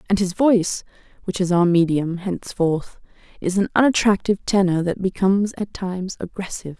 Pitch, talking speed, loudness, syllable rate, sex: 190 Hz, 150 wpm, -20 LUFS, 7.4 syllables/s, female